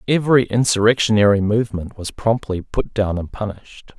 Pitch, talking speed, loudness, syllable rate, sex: 110 Hz, 135 wpm, -18 LUFS, 5.5 syllables/s, male